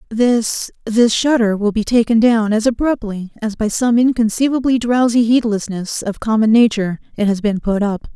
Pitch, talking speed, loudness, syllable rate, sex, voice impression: 225 Hz, 160 wpm, -16 LUFS, 5.0 syllables/s, female, very feminine, very adult-like, very thin, slightly tensed, powerful, slightly bright, slightly soft, slightly muffled, fluent, slightly raspy, cool, very intellectual, refreshing, sincere, slightly calm, friendly, reassuring, very unique, elegant, slightly wild, sweet, slightly lively, strict, modest, light